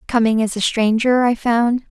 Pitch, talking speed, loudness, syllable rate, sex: 230 Hz, 185 wpm, -17 LUFS, 4.7 syllables/s, female